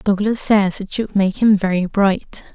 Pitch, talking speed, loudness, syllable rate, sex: 200 Hz, 190 wpm, -17 LUFS, 4.1 syllables/s, female